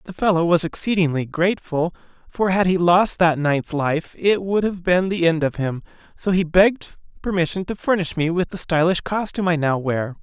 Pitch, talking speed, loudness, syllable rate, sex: 170 Hz, 200 wpm, -20 LUFS, 5.2 syllables/s, male